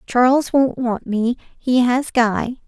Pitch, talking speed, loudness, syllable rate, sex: 245 Hz, 155 wpm, -18 LUFS, 3.7 syllables/s, female